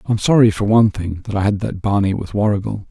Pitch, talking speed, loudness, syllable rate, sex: 105 Hz, 250 wpm, -17 LUFS, 6.2 syllables/s, male